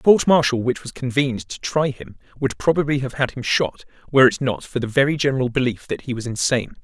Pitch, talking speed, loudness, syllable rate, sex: 130 Hz, 235 wpm, -20 LUFS, 6.3 syllables/s, male